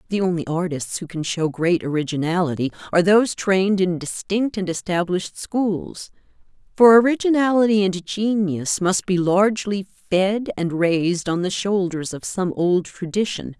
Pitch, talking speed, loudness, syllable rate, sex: 185 Hz, 145 wpm, -20 LUFS, 4.8 syllables/s, female